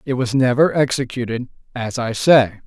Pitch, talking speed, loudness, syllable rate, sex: 125 Hz, 160 wpm, -18 LUFS, 5.1 syllables/s, male